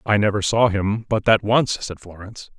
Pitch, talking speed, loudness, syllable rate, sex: 105 Hz, 210 wpm, -19 LUFS, 5.1 syllables/s, male